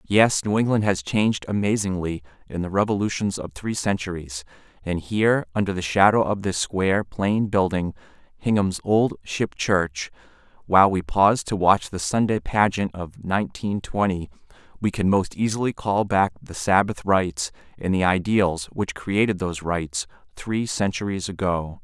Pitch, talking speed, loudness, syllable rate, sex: 95 Hz, 150 wpm, -23 LUFS, 4.8 syllables/s, male